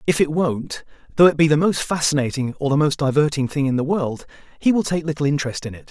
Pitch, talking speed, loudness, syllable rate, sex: 150 Hz, 245 wpm, -20 LUFS, 6.3 syllables/s, male